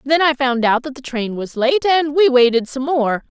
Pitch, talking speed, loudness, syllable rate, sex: 270 Hz, 250 wpm, -17 LUFS, 4.8 syllables/s, female